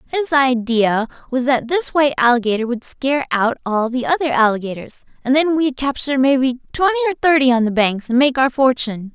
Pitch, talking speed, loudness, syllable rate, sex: 265 Hz, 190 wpm, -17 LUFS, 6.7 syllables/s, female